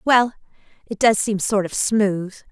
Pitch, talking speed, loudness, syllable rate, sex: 210 Hz, 165 wpm, -19 LUFS, 4.0 syllables/s, female